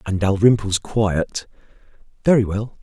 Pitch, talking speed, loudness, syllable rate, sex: 105 Hz, 105 wpm, -19 LUFS, 4.2 syllables/s, male